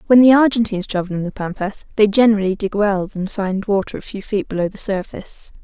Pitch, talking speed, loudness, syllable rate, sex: 205 Hz, 215 wpm, -18 LUFS, 6.1 syllables/s, female